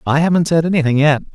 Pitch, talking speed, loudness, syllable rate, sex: 155 Hz, 225 wpm, -14 LUFS, 7.1 syllables/s, male